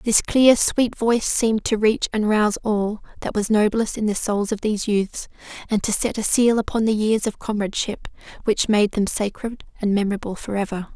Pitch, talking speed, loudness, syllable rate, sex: 215 Hz, 205 wpm, -21 LUFS, 5.3 syllables/s, female